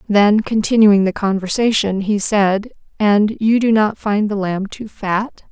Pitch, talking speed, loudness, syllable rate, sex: 210 Hz, 165 wpm, -16 LUFS, 4.0 syllables/s, female